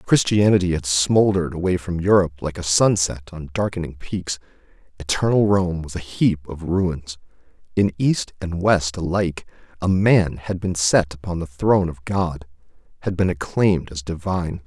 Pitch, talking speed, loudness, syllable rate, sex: 90 Hz, 160 wpm, -21 LUFS, 4.9 syllables/s, male